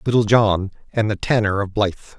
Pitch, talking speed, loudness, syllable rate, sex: 105 Hz, 190 wpm, -19 LUFS, 4.8 syllables/s, male